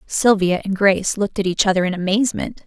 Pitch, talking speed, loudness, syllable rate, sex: 200 Hz, 200 wpm, -18 LUFS, 6.3 syllables/s, female